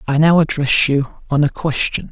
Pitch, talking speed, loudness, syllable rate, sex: 145 Hz, 200 wpm, -16 LUFS, 4.8 syllables/s, male